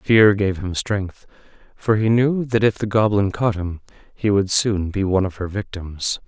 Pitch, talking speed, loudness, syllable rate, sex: 100 Hz, 200 wpm, -20 LUFS, 4.4 syllables/s, male